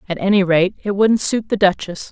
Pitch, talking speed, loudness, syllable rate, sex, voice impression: 195 Hz, 225 wpm, -16 LUFS, 5.3 syllables/s, female, feminine, adult-like, sincere, slightly calm, slightly reassuring, slightly elegant